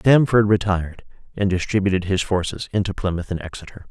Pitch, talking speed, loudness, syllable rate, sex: 95 Hz, 155 wpm, -21 LUFS, 5.9 syllables/s, male